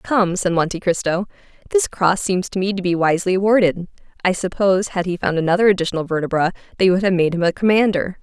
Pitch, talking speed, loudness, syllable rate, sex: 185 Hz, 205 wpm, -18 LUFS, 6.4 syllables/s, female